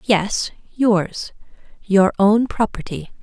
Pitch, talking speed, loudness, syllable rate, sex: 205 Hz, 75 wpm, -18 LUFS, 2.9 syllables/s, female